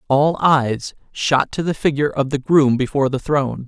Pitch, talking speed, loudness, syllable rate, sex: 140 Hz, 195 wpm, -18 LUFS, 5.1 syllables/s, male